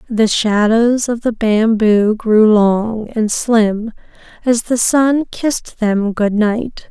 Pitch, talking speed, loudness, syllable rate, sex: 220 Hz, 140 wpm, -14 LUFS, 3.1 syllables/s, female